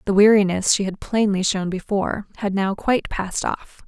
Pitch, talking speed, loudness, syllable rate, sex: 200 Hz, 185 wpm, -20 LUFS, 5.4 syllables/s, female